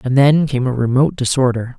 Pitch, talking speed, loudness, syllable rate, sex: 130 Hz, 200 wpm, -15 LUFS, 5.9 syllables/s, male